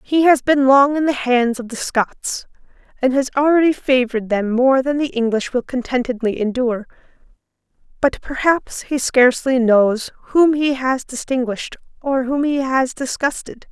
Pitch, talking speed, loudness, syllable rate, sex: 260 Hz, 160 wpm, -17 LUFS, 4.7 syllables/s, female